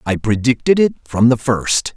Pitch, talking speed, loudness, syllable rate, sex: 120 Hz, 185 wpm, -16 LUFS, 4.6 syllables/s, male